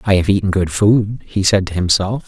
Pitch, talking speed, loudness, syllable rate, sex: 100 Hz, 235 wpm, -16 LUFS, 5.1 syllables/s, male